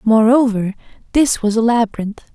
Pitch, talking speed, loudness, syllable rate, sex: 225 Hz, 130 wpm, -16 LUFS, 5.2 syllables/s, female